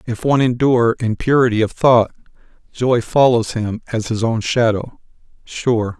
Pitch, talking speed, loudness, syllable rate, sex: 115 Hz, 140 wpm, -17 LUFS, 4.7 syllables/s, male